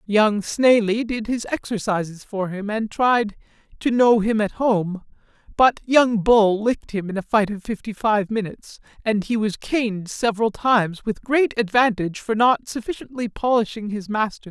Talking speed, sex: 180 wpm, male